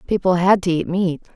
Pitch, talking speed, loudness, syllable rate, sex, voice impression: 180 Hz, 220 wpm, -18 LUFS, 5.5 syllables/s, female, feminine, adult-like, powerful, clear, fluent, intellectual, elegant, lively, slightly intense